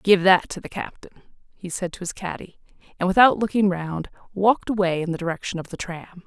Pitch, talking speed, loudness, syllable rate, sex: 185 Hz, 210 wpm, -22 LUFS, 5.9 syllables/s, female